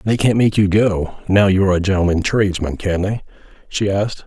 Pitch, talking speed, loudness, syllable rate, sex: 95 Hz, 210 wpm, -17 LUFS, 5.8 syllables/s, male